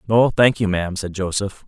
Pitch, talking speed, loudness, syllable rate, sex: 100 Hz, 215 wpm, -19 LUFS, 5.5 syllables/s, male